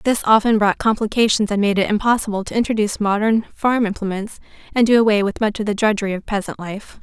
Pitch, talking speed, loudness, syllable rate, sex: 210 Hz, 205 wpm, -18 LUFS, 6.3 syllables/s, female